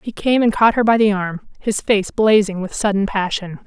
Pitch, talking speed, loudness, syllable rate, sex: 205 Hz, 230 wpm, -17 LUFS, 5.0 syllables/s, female